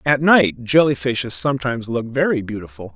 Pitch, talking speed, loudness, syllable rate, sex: 125 Hz, 160 wpm, -18 LUFS, 5.6 syllables/s, male